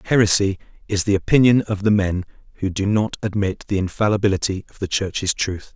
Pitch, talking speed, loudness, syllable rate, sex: 100 Hz, 175 wpm, -20 LUFS, 5.7 syllables/s, male